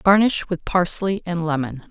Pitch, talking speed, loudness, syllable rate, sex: 175 Hz, 160 wpm, -21 LUFS, 4.6 syllables/s, female